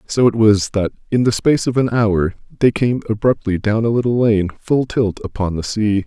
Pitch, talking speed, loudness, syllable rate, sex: 110 Hz, 220 wpm, -17 LUFS, 5.1 syllables/s, male